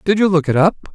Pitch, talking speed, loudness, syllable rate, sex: 175 Hz, 320 wpm, -15 LUFS, 7.4 syllables/s, male